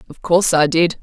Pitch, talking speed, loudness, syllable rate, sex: 165 Hz, 235 wpm, -15 LUFS, 6.0 syllables/s, female